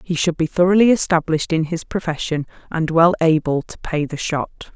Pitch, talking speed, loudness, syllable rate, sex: 165 Hz, 190 wpm, -19 LUFS, 5.4 syllables/s, female